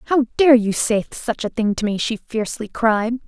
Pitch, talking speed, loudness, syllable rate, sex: 230 Hz, 220 wpm, -19 LUFS, 4.7 syllables/s, female